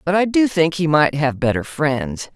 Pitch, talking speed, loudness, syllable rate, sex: 155 Hz, 230 wpm, -18 LUFS, 4.5 syllables/s, female